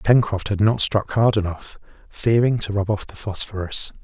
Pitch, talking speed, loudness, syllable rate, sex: 105 Hz, 180 wpm, -21 LUFS, 4.8 syllables/s, male